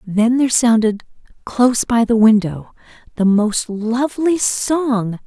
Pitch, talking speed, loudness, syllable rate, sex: 235 Hz, 125 wpm, -16 LUFS, 3.9 syllables/s, female